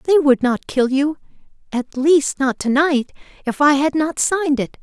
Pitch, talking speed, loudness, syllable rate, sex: 285 Hz, 185 wpm, -18 LUFS, 4.5 syllables/s, female